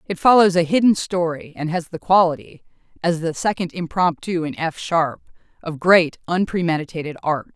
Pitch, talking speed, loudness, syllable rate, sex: 170 Hz, 145 wpm, -19 LUFS, 5.1 syllables/s, female